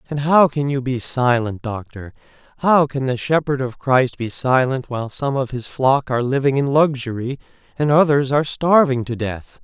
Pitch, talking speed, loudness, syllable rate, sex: 130 Hz, 180 wpm, -18 LUFS, 4.9 syllables/s, male